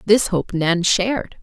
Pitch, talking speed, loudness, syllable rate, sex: 195 Hz, 170 wpm, -18 LUFS, 3.8 syllables/s, female